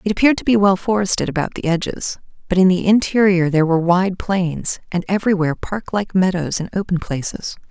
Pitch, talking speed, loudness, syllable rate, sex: 185 Hz, 185 wpm, -18 LUFS, 6.2 syllables/s, female